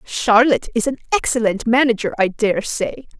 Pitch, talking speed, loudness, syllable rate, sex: 230 Hz, 150 wpm, -17 LUFS, 5.2 syllables/s, female